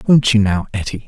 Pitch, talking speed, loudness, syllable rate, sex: 110 Hz, 225 wpm, -16 LUFS, 5.7 syllables/s, male